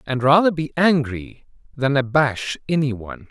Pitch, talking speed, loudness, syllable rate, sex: 140 Hz, 145 wpm, -19 LUFS, 4.7 syllables/s, male